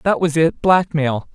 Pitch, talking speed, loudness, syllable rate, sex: 160 Hz, 135 wpm, -17 LUFS, 4.1 syllables/s, male